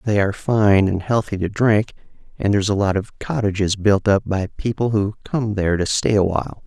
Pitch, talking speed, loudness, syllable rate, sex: 100 Hz, 215 wpm, -19 LUFS, 5.4 syllables/s, male